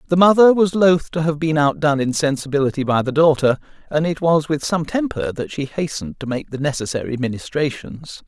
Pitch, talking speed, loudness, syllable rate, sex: 150 Hz, 195 wpm, -18 LUFS, 5.7 syllables/s, male